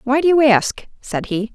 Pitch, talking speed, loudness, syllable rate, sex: 260 Hz, 235 wpm, -17 LUFS, 4.5 syllables/s, female